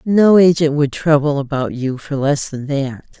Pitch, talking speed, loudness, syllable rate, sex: 145 Hz, 190 wpm, -16 LUFS, 4.4 syllables/s, female